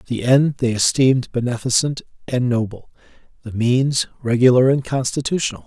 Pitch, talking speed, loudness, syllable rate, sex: 125 Hz, 125 wpm, -18 LUFS, 5.3 syllables/s, male